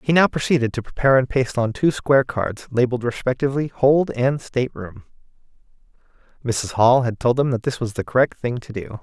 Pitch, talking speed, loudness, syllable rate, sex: 125 Hz, 200 wpm, -20 LUFS, 5.9 syllables/s, male